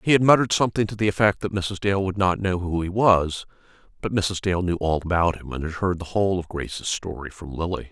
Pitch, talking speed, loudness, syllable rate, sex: 95 Hz, 250 wpm, -23 LUFS, 5.9 syllables/s, male